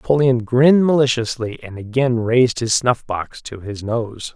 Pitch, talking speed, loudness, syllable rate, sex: 120 Hz, 150 wpm, -18 LUFS, 4.6 syllables/s, male